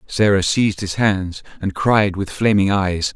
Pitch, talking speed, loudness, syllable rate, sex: 100 Hz, 170 wpm, -18 LUFS, 4.2 syllables/s, male